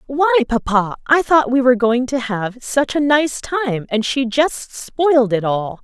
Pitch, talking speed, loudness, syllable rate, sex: 250 Hz, 195 wpm, -17 LUFS, 4.0 syllables/s, female